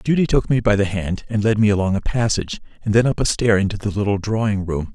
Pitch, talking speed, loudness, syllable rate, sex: 105 Hz, 265 wpm, -19 LUFS, 6.2 syllables/s, male